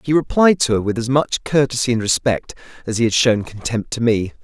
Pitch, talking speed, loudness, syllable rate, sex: 120 Hz, 230 wpm, -18 LUFS, 5.7 syllables/s, male